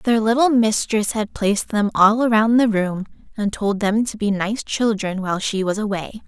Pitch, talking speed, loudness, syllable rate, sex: 210 Hz, 200 wpm, -19 LUFS, 4.8 syllables/s, female